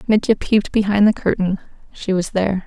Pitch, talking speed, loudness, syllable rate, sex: 200 Hz, 155 wpm, -18 LUFS, 5.9 syllables/s, female